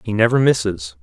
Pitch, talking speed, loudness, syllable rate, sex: 105 Hz, 175 wpm, -17 LUFS, 5.5 syllables/s, male